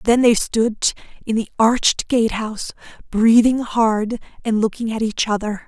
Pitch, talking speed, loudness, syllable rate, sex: 225 Hz, 160 wpm, -18 LUFS, 4.5 syllables/s, female